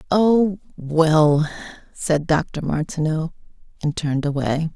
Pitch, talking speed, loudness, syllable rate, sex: 160 Hz, 90 wpm, -20 LUFS, 3.5 syllables/s, female